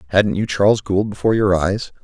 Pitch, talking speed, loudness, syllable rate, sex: 100 Hz, 205 wpm, -17 LUFS, 5.9 syllables/s, male